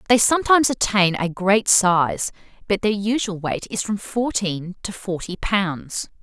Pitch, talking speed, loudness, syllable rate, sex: 200 Hz, 155 wpm, -20 LUFS, 4.2 syllables/s, female